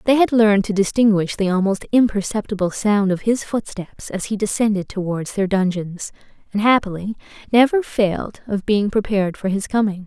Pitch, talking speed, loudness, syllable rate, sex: 205 Hz, 165 wpm, -19 LUFS, 5.3 syllables/s, female